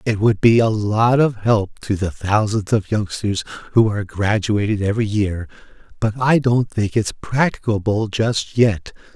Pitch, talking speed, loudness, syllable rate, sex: 105 Hz, 155 wpm, -18 LUFS, 4.5 syllables/s, male